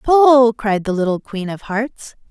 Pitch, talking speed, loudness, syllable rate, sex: 230 Hz, 180 wpm, -16 LUFS, 3.8 syllables/s, female